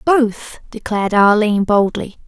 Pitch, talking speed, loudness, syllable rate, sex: 215 Hz, 105 wpm, -15 LUFS, 4.5 syllables/s, female